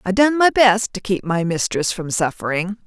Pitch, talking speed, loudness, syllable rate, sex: 200 Hz, 210 wpm, -18 LUFS, 4.8 syllables/s, female